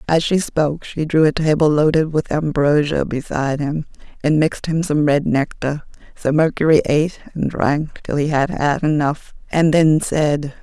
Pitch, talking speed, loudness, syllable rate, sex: 150 Hz, 175 wpm, -18 LUFS, 4.7 syllables/s, female